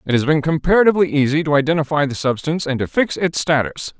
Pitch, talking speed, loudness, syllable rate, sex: 150 Hz, 210 wpm, -17 LUFS, 6.8 syllables/s, male